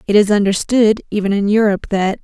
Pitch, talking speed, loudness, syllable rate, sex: 205 Hz, 190 wpm, -15 LUFS, 6.1 syllables/s, female